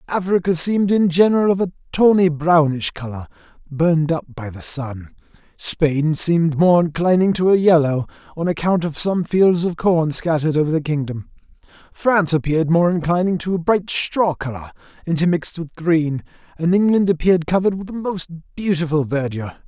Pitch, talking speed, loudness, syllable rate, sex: 165 Hz, 160 wpm, -18 LUFS, 5.3 syllables/s, male